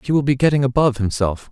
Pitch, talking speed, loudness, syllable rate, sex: 130 Hz, 240 wpm, -18 LUFS, 7.1 syllables/s, male